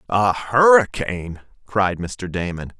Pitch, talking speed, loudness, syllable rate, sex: 100 Hz, 105 wpm, -19 LUFS, 3.8 syllables/s, male